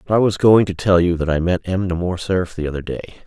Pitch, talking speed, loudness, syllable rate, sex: 90 Hz, 295 wpm, -18 LUFS, 6.1 syllables/s, male